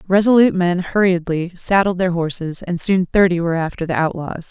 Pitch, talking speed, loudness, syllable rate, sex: 180 Hz, 175 wpm, -17 LUFS, 5.6 syllables/s, female